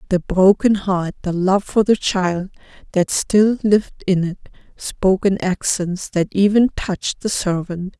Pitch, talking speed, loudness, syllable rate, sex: 190 Hz, 160 wpm, -18 LUFS, 4.3 syllables/s, female